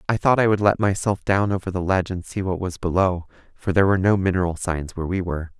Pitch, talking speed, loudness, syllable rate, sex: 95 Hz, 260 wpm, -22 LUFS, 6.6 syllables/s, male